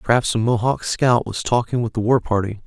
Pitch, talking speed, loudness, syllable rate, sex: 115 Hz, 225 wpm, -19 LUFS, 5.6 syllables/s, male